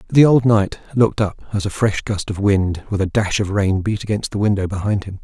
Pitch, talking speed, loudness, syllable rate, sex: 100 Hz, 250 wpm, -18 LUFS, 5.4 syllables/s, male